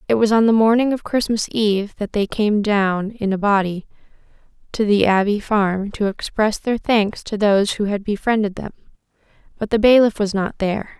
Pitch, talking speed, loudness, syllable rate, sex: 210 Hz, 190 wpm, -18 LUFS, 5.1 syllables/s, female